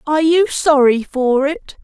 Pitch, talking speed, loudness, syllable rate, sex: 290 Hz, 165 wpm, -15 LUFS, 4.2 syllables/s, female